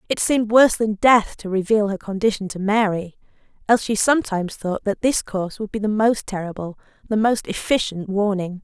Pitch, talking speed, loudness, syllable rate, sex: 210 Hz, 190 wpm, -20 LUFS, 5.7 syllables/s, female